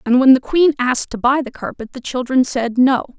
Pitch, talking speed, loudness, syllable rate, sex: 260 Hz, 245 wpm, -16 LUFS, 5.5 syllables/s, female